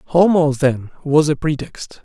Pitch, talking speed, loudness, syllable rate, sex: 150 Hz, 145 wpm, -17 LUFS, 4.4 syllables/s, male